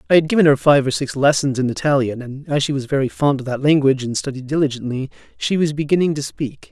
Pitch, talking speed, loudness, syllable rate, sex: 140 Hz, 240 wpm, -18 LUFS, 6.4 syllables/s, male